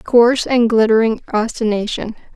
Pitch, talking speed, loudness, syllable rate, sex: 225 Hz, 100 wpm, -16 LUFS, 5.0 syllables/s, female